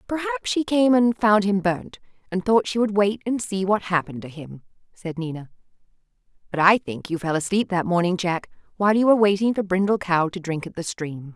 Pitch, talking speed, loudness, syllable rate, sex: 195 Hz, 215 wpm, -22 LUFS, 5.5 syllables/s, female